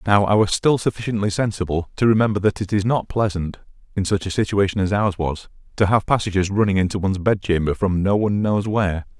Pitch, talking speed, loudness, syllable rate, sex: 100 Hz, 215 wpm, -20 LUFS, 6.1 syllables/s, male